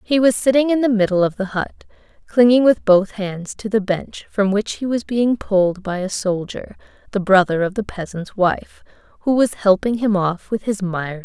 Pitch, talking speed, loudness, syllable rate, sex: 205 Hz, 215 wpm, -18 LUFS, 5.0 syllables/s, female